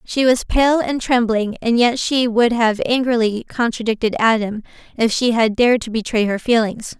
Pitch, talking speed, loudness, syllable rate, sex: 230 Hz, 180 wpm, -17 LUFS, 4.8 syllables/s, female